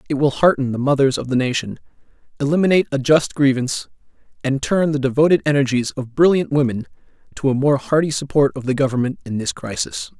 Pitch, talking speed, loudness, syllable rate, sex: 140 Hz, 180 wpm, -18 LUFS, 6.3 syllables/s, male